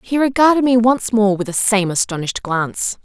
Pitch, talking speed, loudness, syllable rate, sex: 220 Hz, 195 wpm, -16 LUFS, 5.5 syllables/s, female